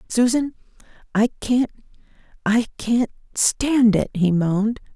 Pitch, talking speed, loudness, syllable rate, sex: 225 Hz, 95 wpm, -20 LUFS, 3.7 syllables/s, female